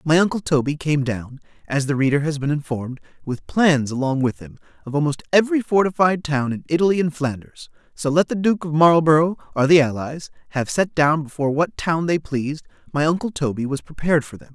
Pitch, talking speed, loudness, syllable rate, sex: 150 Hz, 200 wpm, -20 LUFS, 5.8 syllables/s, male